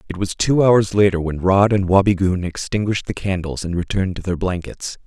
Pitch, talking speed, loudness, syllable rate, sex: 95 Hz, 200 wpm, -18 LUFS, 5.6 syllables/s, male